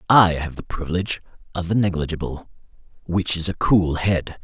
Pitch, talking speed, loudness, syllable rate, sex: 85 Hz, 150 wpm, -21 LUFS, 5.5 syllables/s, male